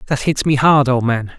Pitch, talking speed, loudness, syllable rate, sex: 130 Hz, 260 wpm, -15 LUFS, 5.2 syllables/s, male